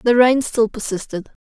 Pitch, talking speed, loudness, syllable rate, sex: 225 Hz, 165 wpm, -18 LUFS, 4.8 syllables/s, female